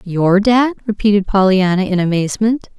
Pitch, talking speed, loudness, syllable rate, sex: 200 Hz, 110 wpm, -14 LUFS, 5.2 syllables/s, female